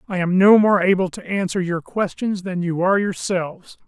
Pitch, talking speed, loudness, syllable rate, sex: 185 Hz, 200 wpm, -19 LUFS, 5.2 syllables/s, male